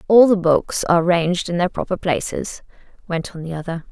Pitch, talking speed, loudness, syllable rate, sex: 175 Hz, 200 wpm, -19 LUFS, 5.5 syllables/s, female